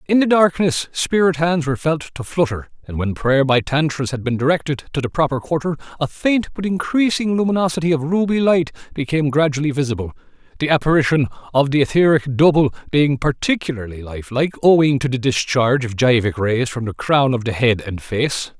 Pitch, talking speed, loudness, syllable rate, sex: 145 Hz, 180 wpm, -18 LUFS, 5.8 syllables/s, male